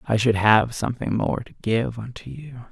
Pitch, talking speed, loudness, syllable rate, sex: 115 Hz, 200 wpm, -22 LUFS, 4.8 syllables/s, male